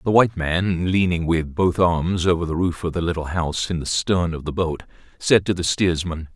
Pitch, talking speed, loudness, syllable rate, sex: 85 Hz, 225 wpm, -21 LUFS, 5.1 syllables/s, male